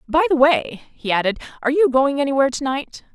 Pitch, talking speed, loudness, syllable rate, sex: 275 Hz, 210 wpm, -19 LUFS, 6.3 syllables/s, female